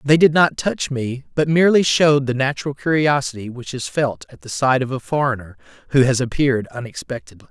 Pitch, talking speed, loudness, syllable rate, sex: 135 Hz, 190 wpm, -19 LUFS, 5.8 syllables/s, male